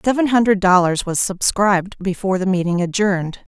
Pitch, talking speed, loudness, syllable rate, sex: 190 Hz, 150 wpm, -17 LUFS, 5.6 syllables/s, female